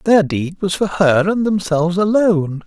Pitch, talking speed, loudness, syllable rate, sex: 185 Hz, 180 wpm, -16 LUFS, 4.8 syllables/s, male